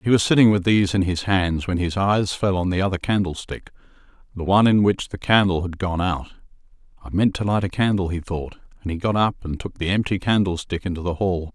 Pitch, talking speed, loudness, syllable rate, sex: 95 Hz, 235 wpm, -21 LUFS, 5.8 syllables/s, male